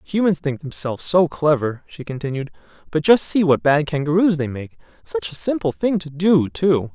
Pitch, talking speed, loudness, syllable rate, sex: 155 Hz, 180 wpm, -19 LUFS, 5.1 syllables/s, male